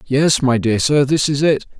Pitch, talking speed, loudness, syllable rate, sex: 135 Hz, 235 wpm, -15 LUFS, 4.4 syllables/s, male